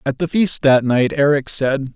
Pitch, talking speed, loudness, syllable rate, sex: 140 Hz, 215 wpm, -16 LUFS, 4.3 syllables/s, male